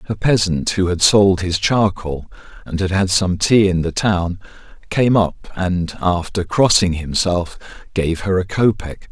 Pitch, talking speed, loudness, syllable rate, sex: 95 Hz, 165 wpm, -17 LUFS, 4.0 syllables/s, male